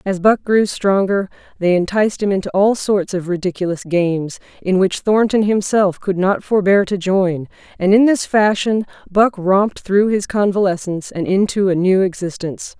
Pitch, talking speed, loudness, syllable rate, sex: 195 Hz, 170 wpm, -16 LUFS, 4.9 syllables/s, female